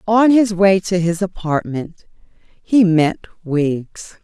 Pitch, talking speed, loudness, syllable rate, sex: 185 Hz, 130 wpm, -16 LUFS, 3.2 syllables/s, female